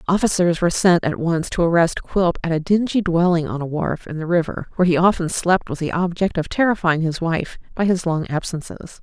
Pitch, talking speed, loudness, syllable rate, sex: 170 Hz, 220 wpm, -19 LUFS, 5.5 syllables/s, female